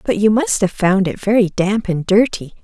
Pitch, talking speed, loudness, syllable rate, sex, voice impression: 205 Hz, 230 wpm, -16 LUFS, 4.9 syllables/s, female, very feminine, slightly young, intellectual, elegant, kind